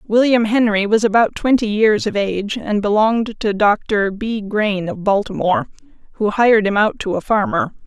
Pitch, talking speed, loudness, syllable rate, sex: 215 Hz, 175 wpm, -17 LUFS, 5.1 syllables/s, female